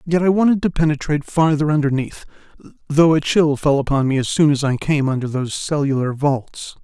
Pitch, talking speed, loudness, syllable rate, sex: 145 Hz, 195 wpm, -18 LUFS, 5.7 syllables/s, male